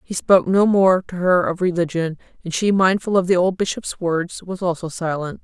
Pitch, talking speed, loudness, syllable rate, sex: 180 Hz, 210 wpm, -19 LUFS, 5.2 syllables/s, female